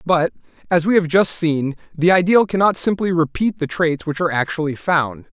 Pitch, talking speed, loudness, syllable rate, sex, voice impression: 170 Hz, 190 wpm, -18 LUFS, 5.2 syllables/s, male, masculine, adult-like, thick, powerful, bright, hard, clear, cool, intellectual, wild, lively, strict, intense